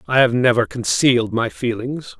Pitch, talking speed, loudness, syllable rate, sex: 120 Hz, 165 wpm, -18 LUFS, 4.9 syllables/s, male